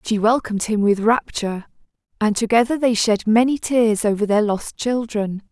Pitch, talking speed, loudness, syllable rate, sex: 220 Hz, 165 wpm, -19 LUFS, 5.0 syllables/s, female